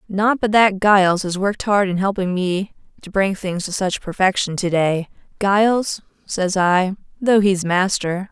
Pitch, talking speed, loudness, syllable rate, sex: 190 Hz, 175 wpm, -18 LUFS, 4.4 syllables/s, female